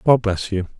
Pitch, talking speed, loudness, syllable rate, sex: 105 Hz, 225 wpm, -20 LUFS, 5.2 syllables/s, male